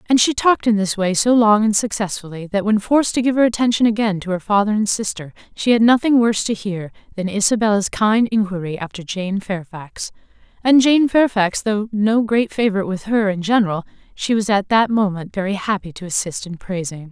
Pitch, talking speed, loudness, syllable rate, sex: 210 Hz, 205 wpm, -18 LUFS, 5.6 syllables/s, female